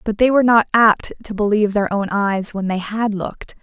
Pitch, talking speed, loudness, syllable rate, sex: 210 Hz, 230 wpm, -17 LUFS, 5.2 syllables/s, female